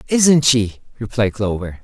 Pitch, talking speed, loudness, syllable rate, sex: 120 Hz, 130 wpm, -17 LUFS, 4.1 syllables/s, male